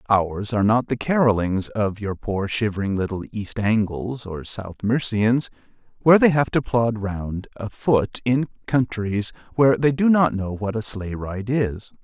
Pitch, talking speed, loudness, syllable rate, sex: 110 Hz, 170 wpm, -22 LUFS, 4.3 syllables/s, male